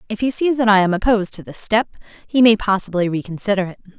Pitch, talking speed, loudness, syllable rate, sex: 205 Hz, 225 wpm, -18 LUFS, 6.7 syllables/s, female